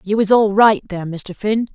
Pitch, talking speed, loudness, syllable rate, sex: 205 Hz, 240 wpm, -16 LUFS, 5.3 syllables/s, female